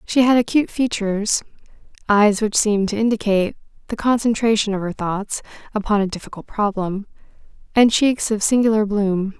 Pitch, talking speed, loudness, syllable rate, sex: 210 Hz, 145 wpm, -19 LUFS, 5.5 syllables/s, female